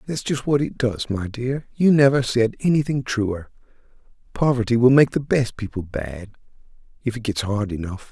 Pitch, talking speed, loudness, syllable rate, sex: 120 Hz, 175 wpm, -21 LUFS, 4.9 syllables/s, male